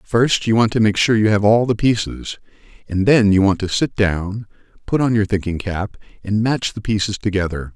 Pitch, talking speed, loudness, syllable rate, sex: 105 Hz, 215 wpm, -18 LUFS, 5.1 syllables/s, male